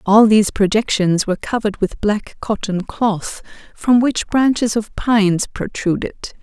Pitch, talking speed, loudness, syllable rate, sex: 210 Hz, 140 wpm, -17 LUFS, 4.6 syllables/s, female